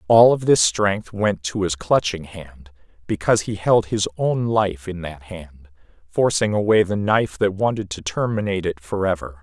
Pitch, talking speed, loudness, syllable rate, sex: 95 Hz, 180 wpm, -20 LUFS, 4.7 syllables/s, male